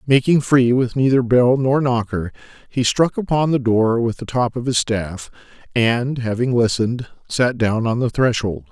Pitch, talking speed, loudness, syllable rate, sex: 120 Hz, 180 wpm, -18 LUFS, 4.5 syllables/s, male